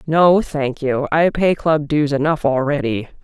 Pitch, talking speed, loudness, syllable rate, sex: 145 Hz, 165 wpm, -17 LUFS, 4.2 syllables/s, female